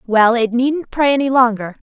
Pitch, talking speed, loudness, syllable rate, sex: 245 Hz, 195 wpm, -15 LUFS, 4.9 syllables/s, female